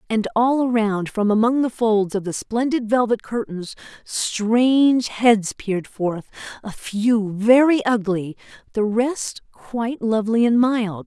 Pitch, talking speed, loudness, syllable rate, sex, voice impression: 225 Hz, 140 wpm, -20 LUFS, 3.9 syllables/s, female, feminine, adult-like, slightly bright, clear, slightly refreshing, friendly, slightly reassuring